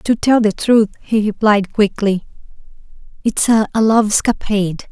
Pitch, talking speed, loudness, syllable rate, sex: 215 Hz, 145 wpm, -15 LUFS, 4.6 syllables/s, female